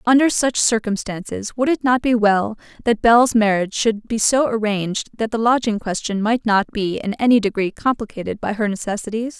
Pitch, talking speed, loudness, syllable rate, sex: 220 Hz, 185 wpm, -19 LUFS, 5.4 syllables/s, female